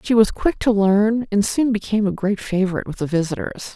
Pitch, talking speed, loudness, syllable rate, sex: 205 Hz, 225 wpm, -20 LUFS, 5.8 syllables/s, female